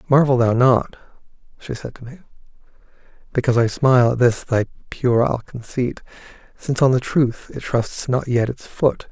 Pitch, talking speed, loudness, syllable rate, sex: 125 Hz, 165 wpm, -19 LUFS, 5.0 syllables/s, male